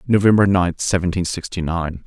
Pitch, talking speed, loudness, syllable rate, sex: 90 Hz, 145 wpm, -18 LUFS, 5.1 syllables/s, male